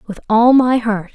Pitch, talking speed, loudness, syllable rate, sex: 225 Hz, 210 wpm, -14 LUFS, 4.5 syllables/s, female